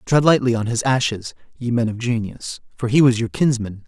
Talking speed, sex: 200 wpm, male